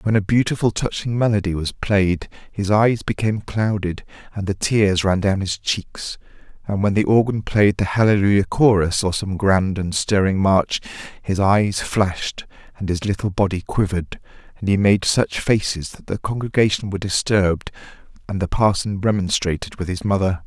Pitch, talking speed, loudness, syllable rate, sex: 100 Hz, 165 wpm, -20 LUFS, 5.0 syllables/s, male